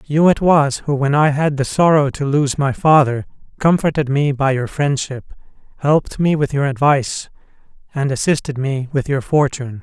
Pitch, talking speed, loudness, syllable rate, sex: 140 Hz, 175 wpm, -17 LUFS, 5.0 syllables/s, male